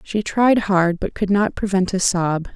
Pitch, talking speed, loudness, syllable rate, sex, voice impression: 195 Hz, 210 wpm, -19 LUFS, 4.1 syllables/s, female, very feminine, adult-like, slightly middle-aged, thin, slightly relaxed, slightly weak, slightly dark, soft, slightly muffled, fluent, slightly raspy, cute, intellectual, slightly refreshing, sincere, calm, friendly, slightly reassuring, unique, elegant, slightly sweet, slightly lively, very modest